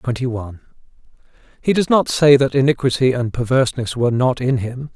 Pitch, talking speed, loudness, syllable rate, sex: 130 Hz, 170 wpm, -17 LUFS, 6.1 syllables/s, male